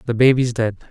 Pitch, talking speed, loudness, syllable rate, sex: 120 Hz, 200 wpm, -17 LUFS, 6.3 syllables/s, male